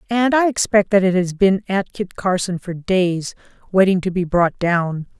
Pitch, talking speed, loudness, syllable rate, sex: 190 Hz, 195 wpm, -18 LUFS, 4.5 syllables/s, female